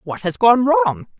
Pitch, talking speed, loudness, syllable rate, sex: 190 Hz, 200 wpm, -16 LUFS, 4.0 syllables/s, female